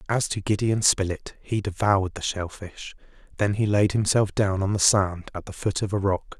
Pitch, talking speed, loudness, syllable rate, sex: 100 Hz, 215 wpm, -24 LUFS, 4.9 syllables/s, male